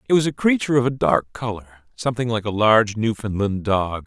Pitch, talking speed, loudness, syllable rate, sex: 110 Hz, 205 wpm, -20 LUFS, 5.9 syllables/s, male